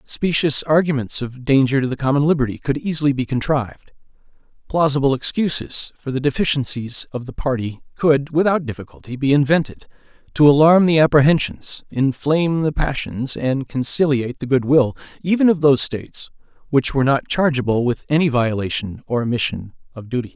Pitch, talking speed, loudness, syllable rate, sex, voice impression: 140 Hz, 155 wpm, -18 LUFS, 5.6 syllables/s, male, masculine, adult-like, slightly middle-aged, slightly thick, slightly tensed, slightly weak, slightly dark, slightly hard, slightly muffled, fluent, slightly raspy, slightly cool, very intellectual, slightly refreshing, sincere, calm, slightly friendly, slightly reassuring, slightly kind, slightly modest